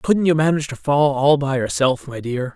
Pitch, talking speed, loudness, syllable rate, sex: 140 Hz, 235 wpm, -19 LUFS, 5.2 syllables/s, male